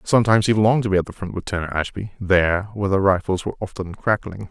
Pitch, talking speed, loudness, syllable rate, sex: 100 Hz, 240 wpm, -21 LUFS, 7.2 syllables/s, male